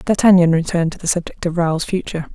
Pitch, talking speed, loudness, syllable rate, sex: 170 Hz, 205 wpm, -17 LUFS, 6.7 syllables/s, female